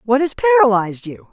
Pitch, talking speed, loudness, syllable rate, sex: 250 Hz, 180 wpm, -15 LUFS, 5.8 syllables/s, female